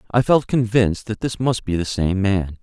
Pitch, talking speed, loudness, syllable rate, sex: 105 Hz, 230 wpm, -20 LUFS, 5.0 syllables/s, male